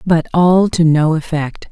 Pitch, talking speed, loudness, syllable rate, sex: 165 Hz, 175 wpm, -14 LUFS, 3.9 syllables/s, female